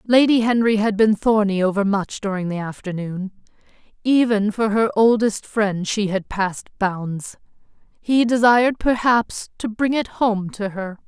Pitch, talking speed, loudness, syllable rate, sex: 210 Hz, 150 wpm, -20 LUFS, 4.3 syllables/s, female